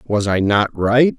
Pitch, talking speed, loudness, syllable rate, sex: 110 Hz, 200 wpm, -16 LUFS, 3.5 syllables/s, male